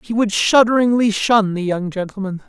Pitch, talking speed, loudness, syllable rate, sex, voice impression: 210 Hz, 170 wpm, -16 LUFS, 5.1 syllables/s, male, slightly masculine, feminine, very gender-neutral, very adult-like, slightly middle-aged, slightly thin, tensed, powerful, bright, slightly hard, fluent, slightly raspy, cool, intellectual, very refreshing, sincere, calm, slightly friendly, slightly reassuring, very unique, slightly elegant, slightly wild, slightly sweet, lively, strict, slightly intense, sharp, slightly light